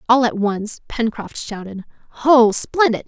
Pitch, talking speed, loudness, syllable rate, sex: 230 Hz, 115 wpm, -18 LUFS, 4.1 syllables/s, female